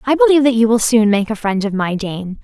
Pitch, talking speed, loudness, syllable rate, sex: 225 Hz, 295 wpm, -15 LUFS, 6.4 syllables/s, female